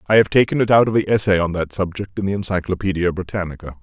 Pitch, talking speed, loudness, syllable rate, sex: 95 Hz, 235 wpm, -19 LUFS, 7.0 syllables/s, male